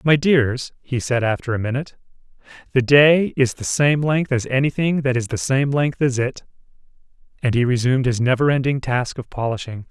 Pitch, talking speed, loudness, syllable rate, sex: 130 Hz, 190 wpm, -19 LUFS, 5.3 syllables/s, male